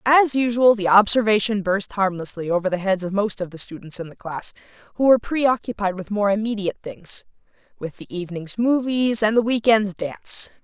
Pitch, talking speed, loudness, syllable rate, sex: 205 Hz, 180 wpm, -21 LUFS, 5.4 syllables/s, female